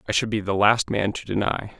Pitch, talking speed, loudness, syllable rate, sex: 105 Hz, 265 wpm, -23 LUFS, 5.6 syllables/s, male